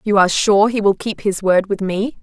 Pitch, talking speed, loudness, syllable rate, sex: 205 Hz, 270 wpm, -16 LUFS, 5.2 syllables/s, female